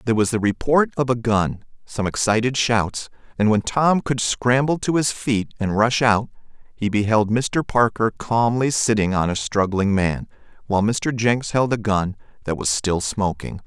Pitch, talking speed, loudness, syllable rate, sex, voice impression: 110 Hz, 180 wpm, -20 LUFS, 4.5 syllables/s, male, masculine, adult-like, slightly fluent, cool, slightly refreshing, sincere, friendly